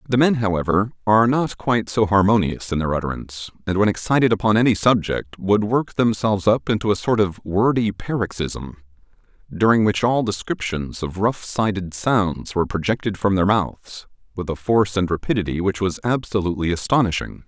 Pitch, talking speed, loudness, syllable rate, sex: 100 Hz, 170 wpm, -20 LUFS, 5.4 syllables/s, male